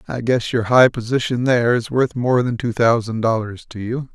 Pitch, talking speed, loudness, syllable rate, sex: 120 Hz, 215 wpm, -18 LUFS, 5.1 syllables/s, male